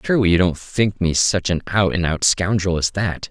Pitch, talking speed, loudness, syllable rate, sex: 90 Hz, 235 wpm, -18 LUFS, 5.0 syllables/s, male